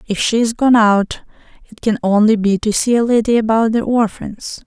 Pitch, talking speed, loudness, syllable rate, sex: 220 Hz, 195 wpm, -15 LUFS, 4.7 syllables/s, female